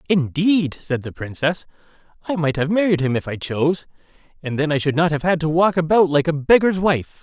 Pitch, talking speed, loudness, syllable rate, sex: 160 Hz, 215 wpm, -19 LUFS, 5.5 syllables/s, male